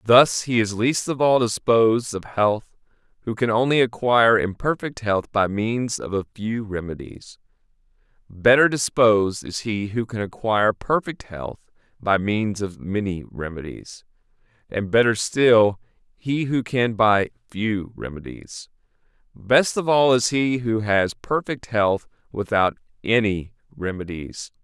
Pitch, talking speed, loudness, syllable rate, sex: 110 Hz, 135 wpm, -21 LUFS, 4.1 syllables/s, male